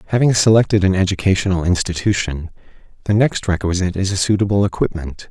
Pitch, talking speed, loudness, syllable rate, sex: 95 Hz, 135 wpm, -17 LUFS, 6.5 syllables/s, male